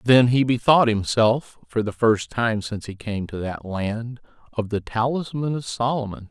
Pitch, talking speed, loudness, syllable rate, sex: 115 Hz, 180 wpm, -22 LUFS, 4.5 syllables/s, male